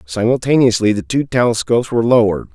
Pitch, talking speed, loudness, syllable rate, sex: 115 Hz, 140 wpm, -15 LUFS, 6.8 syllables/s, male